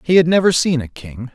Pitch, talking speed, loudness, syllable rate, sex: 145 Hz, 270 wpm, -15 LUFS, 5.7 syllables/s, male